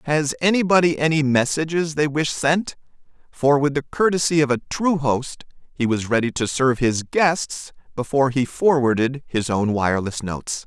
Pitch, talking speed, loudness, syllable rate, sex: 140 Hz, 165 wpm, -20 LUFS, 4.9 syllables/s, male